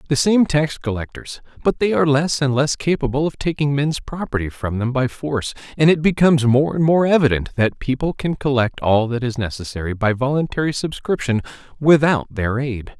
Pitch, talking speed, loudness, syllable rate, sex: 135 Hz, 185 wpm, -19 LUFS, 5.4 syllables/s, male